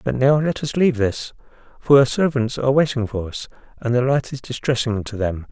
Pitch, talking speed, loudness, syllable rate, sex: 125 Hz, 220 wpm, -20 LUFS, 5.6 syllables/s, male